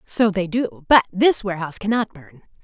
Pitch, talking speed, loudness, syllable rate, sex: 200 Hz, 180 wpm, -19 LUFS, 5.7 syllables/s, female